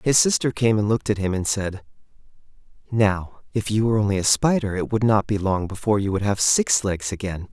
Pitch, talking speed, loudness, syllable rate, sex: 105 Hz, 225 wpm, -21 LUFS, 5.8 syllables/s, male